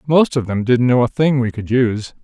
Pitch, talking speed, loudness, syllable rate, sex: 125 Hz, 270 wpm, -16 LUFS, 5.4 syllables/s, male